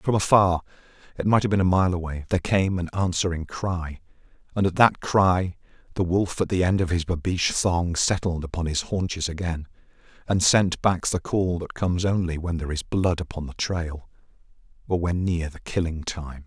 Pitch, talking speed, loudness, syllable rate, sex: 90 Hz, 185 wpm, -24 LUFS, 5.0 syllables/s, male